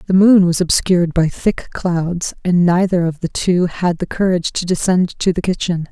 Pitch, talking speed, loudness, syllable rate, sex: 175 Hz, 205 wpm, -16 LUFS, 4.9 syllables/s, female